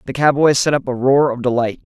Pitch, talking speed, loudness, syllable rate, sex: 135 Hz, 250 wpm, -16 LUFS, 6.0 syllables/s, male